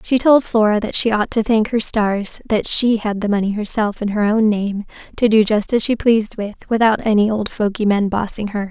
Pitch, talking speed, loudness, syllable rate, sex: 215 Hz, 235 wpm, -17 LUFS, 5.2 syllables/s, female